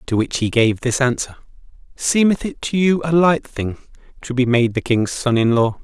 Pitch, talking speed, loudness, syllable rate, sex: 130 Hz, 205 wpm, -18 LUFS, 4.9 syllables/s, male